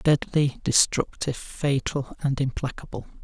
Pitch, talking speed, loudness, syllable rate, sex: 135 Hz, 95 wpm, -25 LUFS, 4.4 syllables/s, male